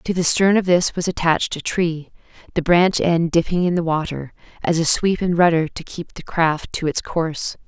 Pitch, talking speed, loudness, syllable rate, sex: 170 Hz, 220 wpm, -19 LUFS, 5.0 syllables/s, female